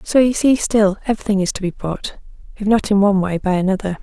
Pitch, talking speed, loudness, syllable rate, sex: 200 Hz, 240 wpm, -17 LUFS, 6.3 syllables/s, female